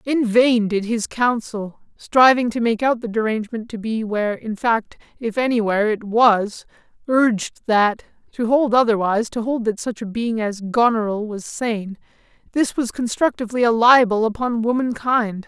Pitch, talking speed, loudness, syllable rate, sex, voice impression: 225 Hz, 165 wpm, -19 LUFS, 4.8 syllables/s, male, slightly masculine, slightly gender-neutral, adult-like, relaxed, slightly weak, slightly soft, fluent, raspy, friendly, unique, slightly lively, slightly kind, slightly modest